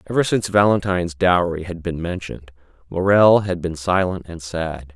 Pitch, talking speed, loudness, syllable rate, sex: 90 Hz, 155 wpm, -19 LUFS, 5.2 syllables/s, male